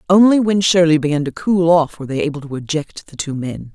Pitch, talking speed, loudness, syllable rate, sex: 160 Hz, 240 wpm, -16 LUFS, 5.9 syllables/s, female